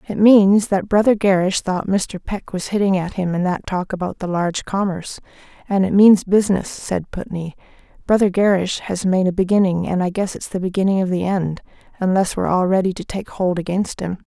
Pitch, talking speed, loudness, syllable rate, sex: 190 Hz, 205 wpm, -18 LUFS, 5.4 syllables/s, female